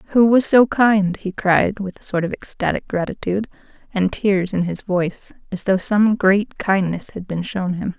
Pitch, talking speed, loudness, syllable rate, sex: 195 Hz, 195 wpm, -19 LUFS, 4.5 syllables/s, female